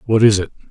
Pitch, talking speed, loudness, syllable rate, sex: 105 Hz, 255 wpm, -15 LUFS, 7.0 syllables/s, male